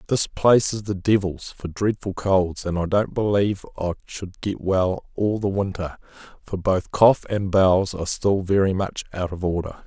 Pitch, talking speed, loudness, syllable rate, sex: 95 Hz, 190 wpm, -22 LUFS, 4.7 syllables/s, male